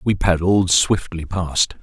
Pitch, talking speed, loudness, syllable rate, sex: 90 Hz, 130 wpm, -18 LUFS, 3.5 syllables/s, male